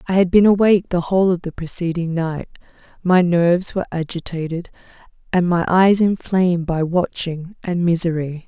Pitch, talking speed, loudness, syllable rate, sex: 175 Hz, 155 wpm, -18 LUFS, 5.3 syllables/s, female